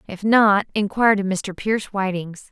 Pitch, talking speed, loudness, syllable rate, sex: 200 Hz, 165 wpm, -20 LUFS, 4.9 syllables/s, female